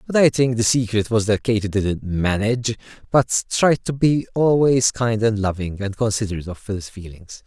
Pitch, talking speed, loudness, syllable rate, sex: 110 Hz, 185 wpm, -20 LUFS, 4.9 syllables/s, male